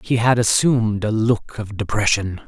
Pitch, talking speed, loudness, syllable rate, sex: 110 Hz, 170 wpm, -19 LUFS, 4.7 syllables/s, male